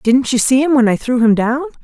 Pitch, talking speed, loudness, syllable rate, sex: 255 Hz, 295 wpm, -14 LUFS, 5.4 syllables/s, female